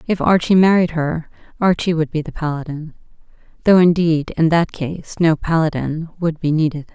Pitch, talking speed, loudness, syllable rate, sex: 160 Hz, 165 wpm, -17 LUFS, 5.0 syllables/s, female